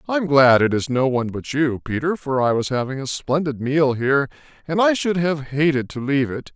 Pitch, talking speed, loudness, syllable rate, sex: 140 Hz, 240 wpm, -20 LUFS, 5.5 syllables/s, male